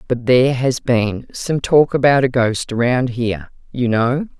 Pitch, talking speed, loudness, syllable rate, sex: 125 Hz, 175 wpm, -17 LUFS, 4.4 syllables/s, female